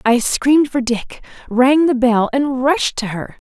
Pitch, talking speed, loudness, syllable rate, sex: 255 Hz, 190 wpm, -16 LUFS, 3.9 syllables/s, female